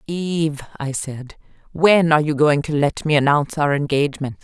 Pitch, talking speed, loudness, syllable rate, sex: 150 Hz, 175 wpm, -18 LUFS, 5.2 syllables/s, female